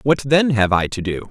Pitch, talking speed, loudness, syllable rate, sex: 120 Hz, 275 wpm, -17 LUFS, 5.3 syllables/s, male